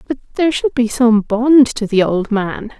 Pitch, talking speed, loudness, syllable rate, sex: 240 Hz, 215 wpm, -14 LUFS, 4.6 syllables/s, female